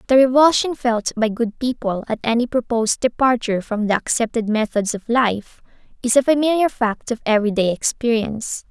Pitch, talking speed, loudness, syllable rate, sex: 235 Hz, 160 wpm, -19 LUFS, 5.4 syllables/s, female